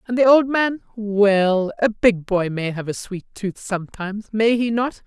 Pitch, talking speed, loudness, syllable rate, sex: 210 Hz, 190 wpm, -20 LUFS, 4.3 syllables/s, female